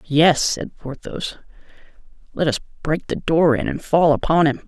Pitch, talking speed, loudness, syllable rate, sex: 155 Hz, 165 wpm, -20 LUFS, 4.6 syllables/s, male